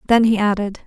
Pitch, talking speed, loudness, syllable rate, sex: 210 Hz, 210 wpm, -17 LUFS, 6.6 syllables/s, female